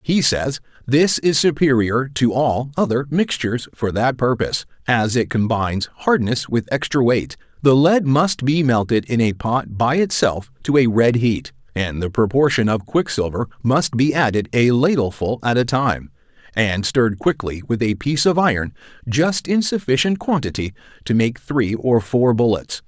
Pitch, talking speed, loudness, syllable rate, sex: 125 Hz, 170 wpm, -18 LUFS, 4.7 syllables/s, male